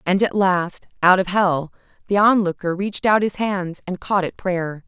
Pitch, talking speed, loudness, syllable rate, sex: 185 Hz, 195 wpm, -20 LUFS, 4.5 syllables/s, female